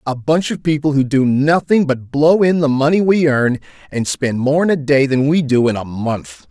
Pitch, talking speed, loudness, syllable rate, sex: 140 Hz, 240 wpm, -15 LUFS, 4.8 syllables/s, male